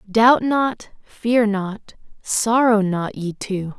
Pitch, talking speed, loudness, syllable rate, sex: 215 Hz, 125 wpm, -19 LUFS, 2.8 syllables/s, female